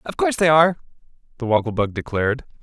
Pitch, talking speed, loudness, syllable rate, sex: 135 Hz, 185 wpm, -19 LUFS, 7.4 syllables/s, male